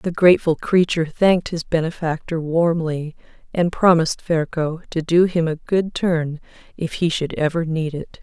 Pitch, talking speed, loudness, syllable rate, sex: 165 Hz, 160 wpm, -20 LUFS, 4.7 syllables/s, female